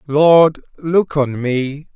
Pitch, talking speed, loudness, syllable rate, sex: 145 Hz, 125 wpm, -15 LUFS, 2.5 syllables/s, male